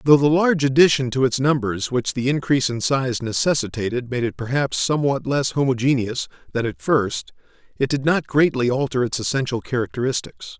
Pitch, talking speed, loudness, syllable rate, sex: 130 Hz, 170 wpm, -20 LUFS, 5.6 syllables/s, male